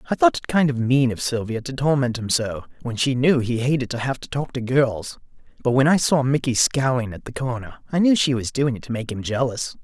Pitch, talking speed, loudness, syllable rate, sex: 130 Hz, 255 wpm, -21 LUFS, 5.6 syllables/s, male